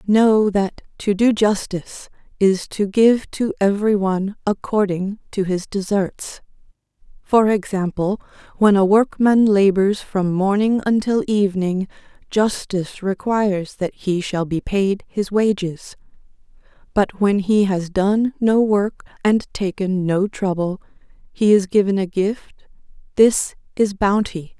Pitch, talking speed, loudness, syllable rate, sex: 200 Hz, 125 wpm, -19 LUFS, 3.9 syllables/s, female